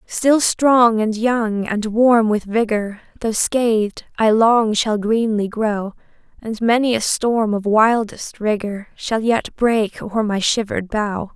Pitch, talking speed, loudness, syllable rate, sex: 220 Hz, 155 wpm, -18 LUFS, 3.7 syllables/s, female